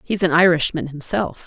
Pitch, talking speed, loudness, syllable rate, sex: 165 Hz, 165 wpm, -18 LUFS, 5.1 syllables/s, female